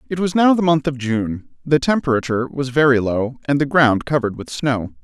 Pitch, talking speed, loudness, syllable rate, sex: 135 Hz, 215 wpm, -18 LUFS, 5.5 syllables/s, male